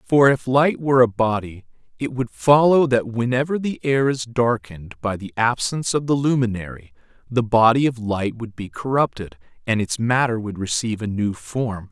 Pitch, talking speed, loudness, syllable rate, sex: 120 Hz, 180 wpm, -20 LUFS, 5.0 syllables/s, male